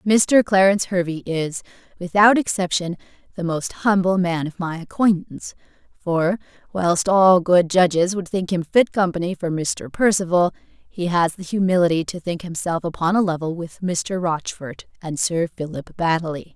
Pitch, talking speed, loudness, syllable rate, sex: 180 Hz, 155 wpm, -20 LUFS, 4.7 syllables/s, female